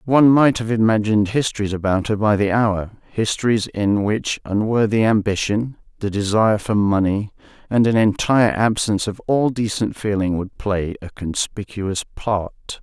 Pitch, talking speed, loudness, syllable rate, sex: 105 Hz, 150 wpm, -19 LUFS, 4.8 syllables/s, male